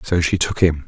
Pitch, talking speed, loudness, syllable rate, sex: 85 Hz, 275 wpm, -18 LUFS, 5.2 syllables/s, male